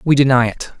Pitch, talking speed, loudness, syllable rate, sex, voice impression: 135 Hz, 225 wpm, -15 LUFS, 6.1 syllables/s, male, masculine, adult-like, tensed, powerful, bright, clear, slightly muffled, cool, intellectual, calm, friendly, lively, light